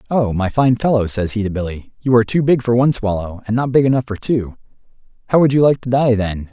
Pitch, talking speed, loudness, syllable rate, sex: 115 Hz, 260 wpm, -17 LUFS, 6.2 syllables/s, male